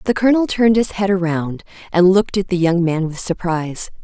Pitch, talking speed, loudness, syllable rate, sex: 185 Hz, 210 wpm, -17 LUFS, 5.7 syllables/s, female